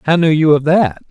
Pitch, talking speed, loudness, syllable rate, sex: 155 Hz, 270 wpm, -12 LUFS, 5.5 syllables/s, male